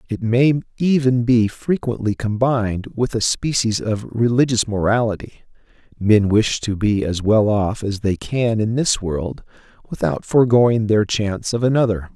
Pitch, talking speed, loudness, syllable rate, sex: 115 Hz, 155 wpm, -18 LUFS, 4.8 syllables/s, male